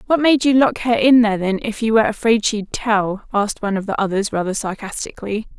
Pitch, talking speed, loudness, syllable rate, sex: 215 Hz, 225 wpm, -18 LUFS, 6.2 syllables/s, female